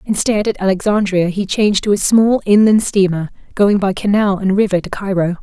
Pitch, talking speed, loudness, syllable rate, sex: 200 Hz, 190 wpm, -15 LUFS, 5.4 syllables/s, female